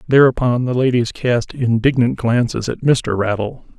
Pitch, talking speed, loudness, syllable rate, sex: 120 Hz, 145 wpm, -17 LUFS, 4.6 syllables/s, male